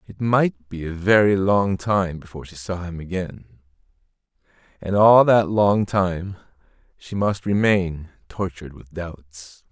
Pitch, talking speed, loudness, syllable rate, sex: 95 Hz, 140 wpm, -20 LUFS, 4.0 syllables/s, male